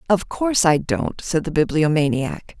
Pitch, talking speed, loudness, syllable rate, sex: 165 Hz, 160 wpm, -20 LUFS, 4.7 syllables/s, female